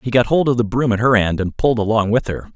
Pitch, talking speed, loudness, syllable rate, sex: 115 Hz, 330 wpm, -17 LUFS, 6.6 syllables/s, male